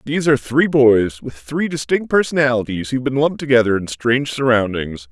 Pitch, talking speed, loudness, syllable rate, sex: 130 Hz, 175 wpm, -17 LUFS, 5.8 syllables/s, male